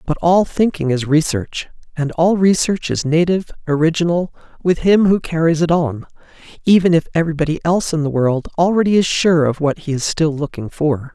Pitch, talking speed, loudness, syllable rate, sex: 165 Hz, 185 wpm, -16 LUFS, 5.5 syllables/s, male